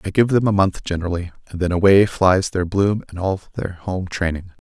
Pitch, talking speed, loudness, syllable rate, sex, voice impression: 95 Hz, 220 wpm, -19 LUFS, 5.4 syllables/s, male, very masculine, very adult-like, cool, slightly intellectual, calm, slightly mature, slightly wild